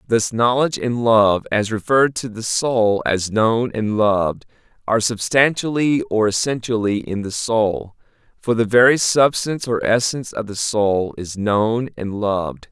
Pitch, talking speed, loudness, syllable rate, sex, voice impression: 110 Hz, 155 wpm, -18 LUFS, 4.4 syllables/s, male, masculine, adult-like, tensed, powerful, clear, fluent, cool, intellectual, calm, wild, lively, slightly strict